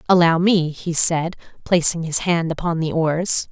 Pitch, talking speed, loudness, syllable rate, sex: 165 Hz, 170 wpm, -19 LUFS, 4.3 syllables/s, female